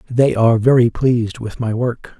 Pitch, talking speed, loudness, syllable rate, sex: 120 Hz, 190 wpm, -16 LUFS, 5.1 syllables/s, male